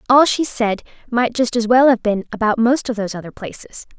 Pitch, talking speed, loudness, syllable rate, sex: 230 Hz, 225 wpm, -17 LUFS, 5.7 syllables/s, female